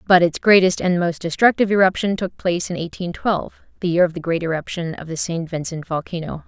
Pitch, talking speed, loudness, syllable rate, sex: 175 Hz, 215 wpm, -20 LUFS, 6.1 syllables/s, female